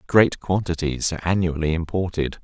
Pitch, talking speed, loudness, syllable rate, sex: 85 Hz, 125 wpm, -22 LUFS, 5.4 syllables/s, male